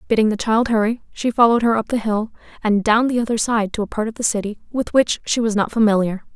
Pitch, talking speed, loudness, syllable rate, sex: 220 Hz, 255 wpm, -19 LUFS, 6.3 syllables/s, female